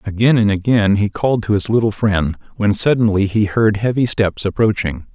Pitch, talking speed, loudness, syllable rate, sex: 105 Hz, 185 wpm, -16 LUFS, 5.2 syllables/s, male